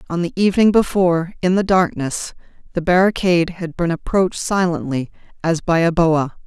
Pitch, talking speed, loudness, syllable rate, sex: 175 Hz, 160 wpm, -18 LUFS, 5.4 syllables/s, female